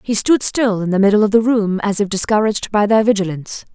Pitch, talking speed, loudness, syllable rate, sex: 210 Hz, 240 wpm, -15 LUFS, 6.2 syllables/s, female